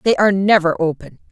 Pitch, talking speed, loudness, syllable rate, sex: 180 Hz, 185 wpm, -16 LUFS, 6.2 syllables/s, female